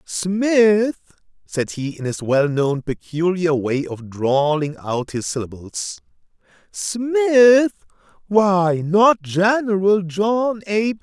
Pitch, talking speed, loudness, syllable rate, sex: 180 Hz, 110 wpm, -19 LUFS, 3.3 syllables/s, male